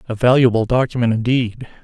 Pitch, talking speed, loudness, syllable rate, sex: 120 Hz, 130 wpm, -17 LUFS, 6.0 syllables/s, male